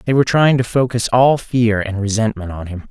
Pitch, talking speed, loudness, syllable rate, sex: 115 Hz, 230 wpm, -16 LUFS, 5.4 syllables/s, male